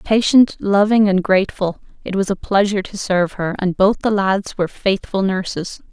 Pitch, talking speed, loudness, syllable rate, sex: 195 Hz, 180 wpm, -17 LUFS, 5.1 syllables/s, female